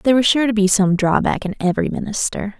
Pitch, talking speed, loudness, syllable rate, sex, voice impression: 210 Hz, 230 wpm, -17 LUFS, 6.4 syllables/s, female, feminine, adult-like, relaxed, slightly weak, bright, soft, clear, fluent, raspy, intellectual, calm, reassuring, slightly kind, modest